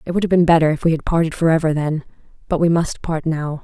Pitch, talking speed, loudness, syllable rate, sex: 160 Hz, 265 wpm, -18 LUFS, 6.5 syllables/s, female